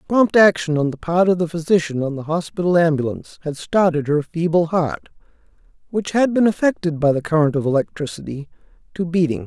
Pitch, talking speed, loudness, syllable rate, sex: 165 Hz, 175 wpm, -19 LUFS, 5.9 syllables/s, male